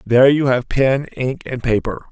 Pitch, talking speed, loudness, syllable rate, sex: 130 Hz, 200 wpm, -17 LUFS, 4.7 syllables/s, male